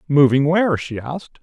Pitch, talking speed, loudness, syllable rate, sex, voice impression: 150 Hz, 170 wpm, -17 LUFS, 5.5 syllables/s, male, masculine, slightly middle-aged, slightly thick, cool, sincere, slightly elegant, slightly kind